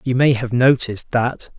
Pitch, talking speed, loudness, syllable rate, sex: 125 Hz, 190 wpm, -17 LUFS, 4.8 syllables/s, male